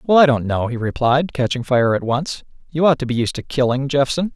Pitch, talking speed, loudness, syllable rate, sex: 135 Hz, 250 wpm, -18 LUFS, 5.4 syllables/s, male